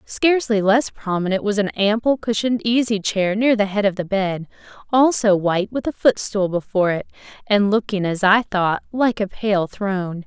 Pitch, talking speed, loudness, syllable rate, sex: 205 Hz, 180 wpm, -19 LUFS, 5.0 syllables/s, female